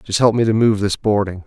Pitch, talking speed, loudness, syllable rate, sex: 105 Hz, 285 wpm, -17 LUFS, 5.6 syllables/s, male